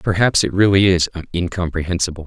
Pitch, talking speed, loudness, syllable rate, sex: 90 Hz, 130 wpm, -17 LUFS, 6.2 syllables/s, male